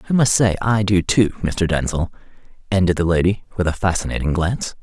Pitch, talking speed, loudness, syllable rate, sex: 95 Hz, 185 wpm, -19 LUFS, 5.8 syllables/s, male